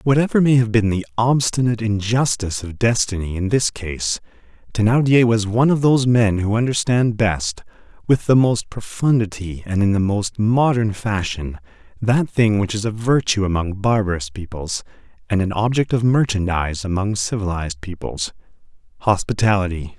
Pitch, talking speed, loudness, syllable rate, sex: 105 Hz, 145 wpm, -19 LUFS, 5.1 syllables/s, male